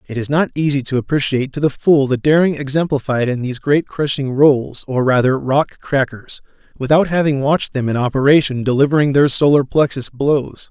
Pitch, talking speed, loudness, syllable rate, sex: 140 Hz, 180 wpm, -16 LUFS, 5.4 syllables/s, male